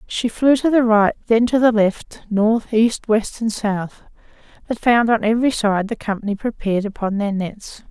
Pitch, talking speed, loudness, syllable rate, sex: 220 Hz, 190 wpm, -18 LUFS, 4.6 syllables/s, female